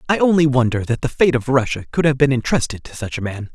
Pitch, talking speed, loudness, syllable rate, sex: 130 Hz, 270 wpm, -18 LUFS, 6.4 syllables/s, male